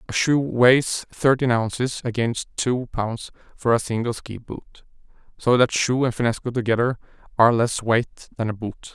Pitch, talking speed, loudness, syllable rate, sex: 120 Hz, 160 wpm, -21 LUFS, 4.6 syllables/s, male